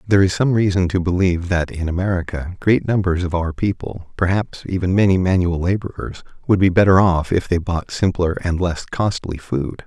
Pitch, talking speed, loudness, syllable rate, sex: 90 Hz, 190 wpm, -19 LUFS, 5.2 syllables/s, male